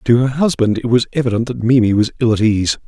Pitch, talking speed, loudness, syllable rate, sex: 120 Hz, 250 wpm, -15 LUFS, 6.2 syllables/s, male